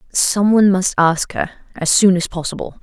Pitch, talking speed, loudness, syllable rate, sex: 185 Hz, 150 wpm, -16 LUFS, 5.2 syllables/s, female